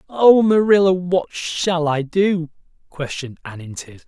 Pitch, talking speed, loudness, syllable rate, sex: 170 Hz, 145 wpm, -17 LUFS, 4.5 syllables/s, male